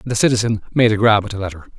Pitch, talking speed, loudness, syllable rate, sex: 105 Hz, 270 wpm, -17 LUFS, 7.3 syllables/s, male